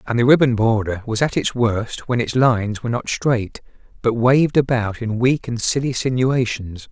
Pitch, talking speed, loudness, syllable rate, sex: 120 Hz, 190 wpm, -19 LUFS, 4.9 syllables/s, male